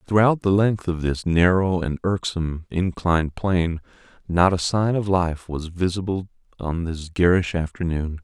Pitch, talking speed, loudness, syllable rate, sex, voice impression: 90 Hz, 155 wpm, -22 LUFS, 4.6 syllables/s, male, very masculine, very middle-aged, very thick, tensed, powerful, dark, very soft, muffled, slightly fluent, raspy, very cool, intellectual, slightly refreshing, sincere, very calm, very mature, friendly, slightly reassuring, unique, slightly elegant, wild, sweet, lively, kind, modest